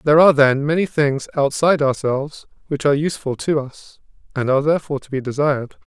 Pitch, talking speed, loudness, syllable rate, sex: 145 Hz, 180 wpm, -18 LUFS, 6.7 syllables/s, male